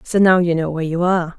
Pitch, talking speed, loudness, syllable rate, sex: 175 Hz, 305 wpm, -17 LUFS, 7.0 syllables/s, female